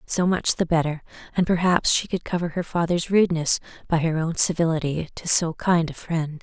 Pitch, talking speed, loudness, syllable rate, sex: 165 Hz, 195 wpm, -22 LUFS, 5.3 syllables/s, female